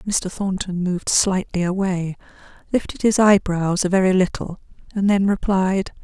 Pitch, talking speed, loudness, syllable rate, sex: 190 Hz, 140 wpm, -20 LUFS, 4.7 syllables/s, female